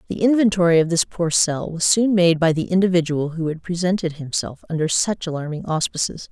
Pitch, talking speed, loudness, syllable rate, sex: 170 Hz, 190 wpm, -20 LUFS, 5.6 syllables/s, female